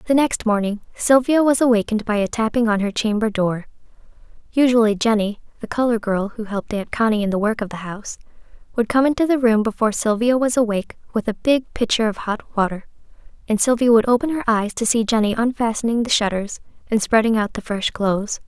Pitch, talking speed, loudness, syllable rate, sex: 225 Hz, 200 wpm, -19 LUFS, 6.0 syllables/s, female